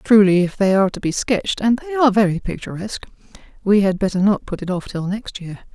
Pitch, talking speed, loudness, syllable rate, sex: 200 Hz, 210 wpm, -18 LUFS, 6.2 syllables/s, female